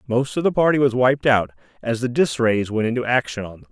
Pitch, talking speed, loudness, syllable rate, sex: 120 Hz, 260 wpm, -20 LUFS, 5.9 syllables/s, male